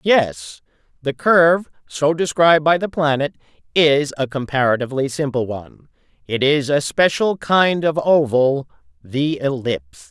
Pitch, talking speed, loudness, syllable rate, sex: 145 Hz, 125 wpm, -18 LUFS, 4.5 syllables/s, male